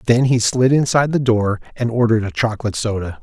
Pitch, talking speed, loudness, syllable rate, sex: 115 Hz, 205 wpm, -17 LUFS, 6.5 syllables/s, male